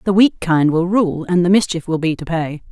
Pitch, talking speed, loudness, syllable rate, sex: 175 Hz, 265 wpm, -16 LUFS, 5.1 syllables/s, female